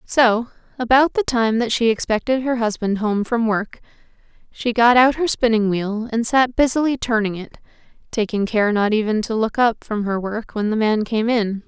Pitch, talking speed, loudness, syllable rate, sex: 225 Hz, 195 wpm, -19 LUFS, 4.8 syllables/s, female